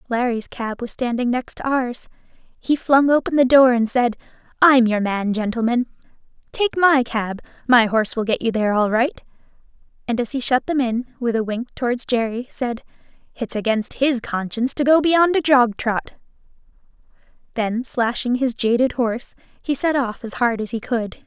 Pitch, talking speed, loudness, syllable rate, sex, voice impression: 245 Hz, 180 wpm, -20 LUFS, 5.0 syllables/s, female, very feminine, slightly adult-like, soft, cute, calm, slightly sweet, kind